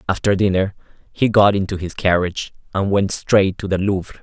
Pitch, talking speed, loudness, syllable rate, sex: 95 Hz, 185 wpm, -18 LUFS, 5.4 syllables/s, male